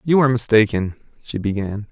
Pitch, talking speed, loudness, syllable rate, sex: 115 Hz, 155 wpm, -19 LUFS, 5.8 syllables/s, male